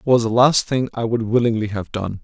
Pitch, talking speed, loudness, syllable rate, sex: 115 Hz, 270 wpm, -19 LUFS, 5.6 syllables/s, male